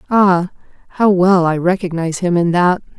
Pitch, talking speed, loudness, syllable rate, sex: 180 Hz, 160 wpm, -15 LUFS, 5.0 syllables/s, female